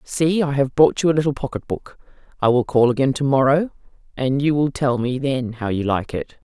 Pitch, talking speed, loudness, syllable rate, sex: 135 Hz, 220 wpm, -20 LUFS, 5.3 syllables/s, female